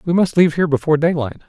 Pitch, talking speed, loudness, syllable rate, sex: 160 Hz, 245 wpm, -16 LUFS, 8.3 syllables/s, male